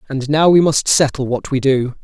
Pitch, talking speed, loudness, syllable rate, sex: 140 Hz, 235 wpm, -15 LUFS, 5.0 syllables/s, male